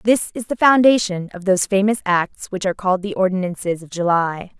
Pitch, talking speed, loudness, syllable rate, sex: 195 Hz, 195 wpm, -18 LUFS, 5.9 syllables/s, female